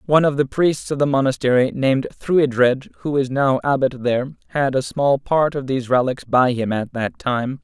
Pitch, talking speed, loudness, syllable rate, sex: 135 Hz, 205 wpm, -19 LUFS, 5.1 syllables/s, male